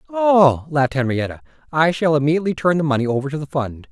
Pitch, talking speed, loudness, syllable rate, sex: 150 Hz, 200 wpm, -18 LUFS, 6.5 syllables/s, male